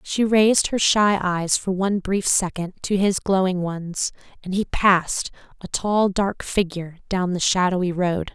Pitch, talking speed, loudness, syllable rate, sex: 190 Hz, 175 wpm, -21 LUFS, 4.4 syllables/s, female